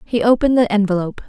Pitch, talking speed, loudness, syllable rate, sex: 220 Hz, 190 wpm, -16 LUFS, 7.8 syllables/s, female